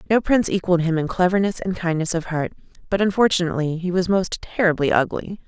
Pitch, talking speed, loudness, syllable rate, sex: 180 Hz, 185 wpm, -21 LUFS, 6.4 syllables/s, female